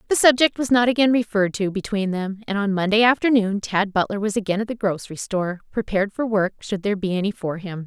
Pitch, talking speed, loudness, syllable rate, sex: 205 Hz, 230 wpm, -21 LUFS, 6.3 syllables/s, female